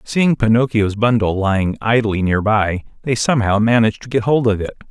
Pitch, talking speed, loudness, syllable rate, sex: 110 Hz, 185 wpm, -16 LUFS, 5.4 syllables/s, male